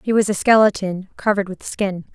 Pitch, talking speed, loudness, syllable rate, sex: 195 Hz, 195 wpm, -19 LUFS, 5.8 syllables/s, female